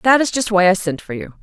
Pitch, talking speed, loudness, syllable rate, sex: 200 Hz, 335 wpm, -16 LUFS, 6.4 syllables/s, female